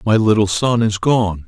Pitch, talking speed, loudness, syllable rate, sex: 110 Hz, 205 wpm, -16 LUFS, 4.4 syllables/s, male